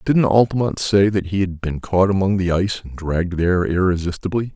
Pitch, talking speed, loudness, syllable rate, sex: 95 Hz, 210 wpm, -19 LUFS, 5.9 syllables/s, male